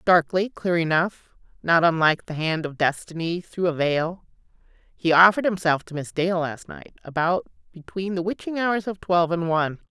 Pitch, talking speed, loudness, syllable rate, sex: 175 Hz, 170 wpm, -23 LUFS, 5.2 syllables/s, female